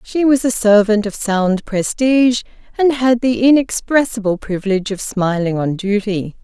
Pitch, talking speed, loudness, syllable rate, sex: 220 Hz, 150 wpm, -16 LUFS, 4.7 syllables/s, female